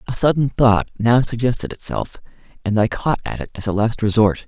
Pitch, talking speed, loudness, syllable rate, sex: 110 Hz, 200 wpm, -19 LUFS, 5.4 syllables/s, male